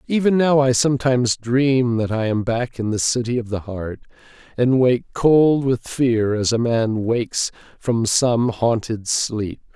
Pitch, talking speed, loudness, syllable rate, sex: 120 Hz, 170 wpm, -19 LUFS, 4.1 syllables/s, male